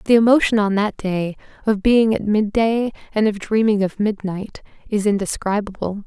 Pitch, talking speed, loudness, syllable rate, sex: 210 Hz, 170 wpm, -19 LUFS, 4.9 syllables/s, female